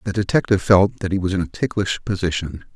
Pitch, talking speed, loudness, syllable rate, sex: 95 Hz, 220 wpm, -20 LUFS, 6.2 syllables/s, male